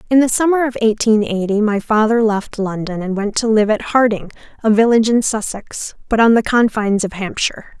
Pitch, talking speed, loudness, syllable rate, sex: 220 Hz, 200 wpm, -16 LUFS, 5.5 syllables/s, female